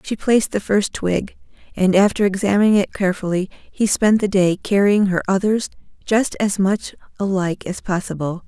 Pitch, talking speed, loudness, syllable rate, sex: 195 Hz, 165 wpm, -19 LUFS, 5.1 syllables/s, female